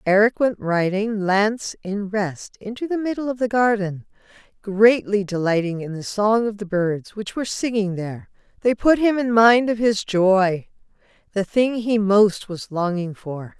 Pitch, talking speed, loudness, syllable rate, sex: 205 Hz, 170 wpm, -20 LUFS, 4.4 syllables/s, female